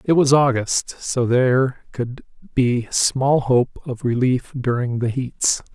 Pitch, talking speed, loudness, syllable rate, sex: 130 Hz, 145 wpm, -20 LUFS, 3.5 syllables/s, male